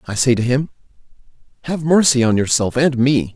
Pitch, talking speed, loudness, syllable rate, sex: 130 Hz, 180 wpm, -16 LUFS, 5.4 syllables/s, male